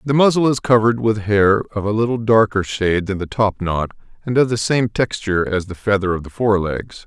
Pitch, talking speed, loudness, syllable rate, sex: 105 Hz, 220 wpm, -18 LUFS, 5.4 syllables/s, male